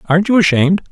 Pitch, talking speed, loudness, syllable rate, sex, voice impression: 180 Hz, 200 wpm, -13 LUFS, 7.9 syllables/s, male, masculine, adult-like, tensed, slightly powerful, bright, soft, fluent, cool, intellectual, refreshing, sincere, calm, friendly, slightly reassuring, slightly unique, lively, kind